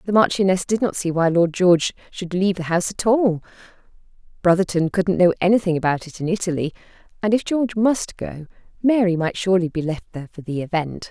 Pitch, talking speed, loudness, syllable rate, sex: 185 Hz, 195 wpm, -20 LUFS, 6.1 syllables/s, female